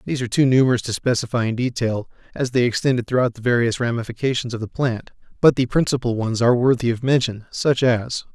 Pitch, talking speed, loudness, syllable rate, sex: 120 Hz, 200 wpm, -20 LUFS, 6.3 syllables/s, male